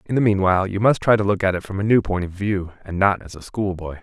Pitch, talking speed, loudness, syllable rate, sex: 95 Hz, 315 wpm, -20 LUFS, 6.5 syllables/s, male